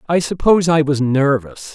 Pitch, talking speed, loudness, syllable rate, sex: 145 Hz, 170 wpm, -16 LUFS, 5.1 syllables/s, male